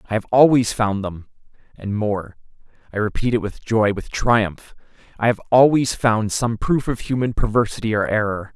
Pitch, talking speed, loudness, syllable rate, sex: 110 Hz, 160 wpm, -19 LUFS, 4.9 syllables/s, male